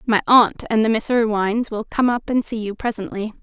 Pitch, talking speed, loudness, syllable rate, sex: 225 Hz, 230 wpm, -19 LUFS, 5.6 syllables/s, female